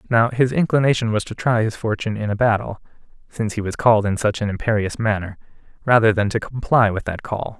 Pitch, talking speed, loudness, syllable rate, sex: 110 Hz, 215 wpm, -20 LUFS, 6.2 syllables/s, male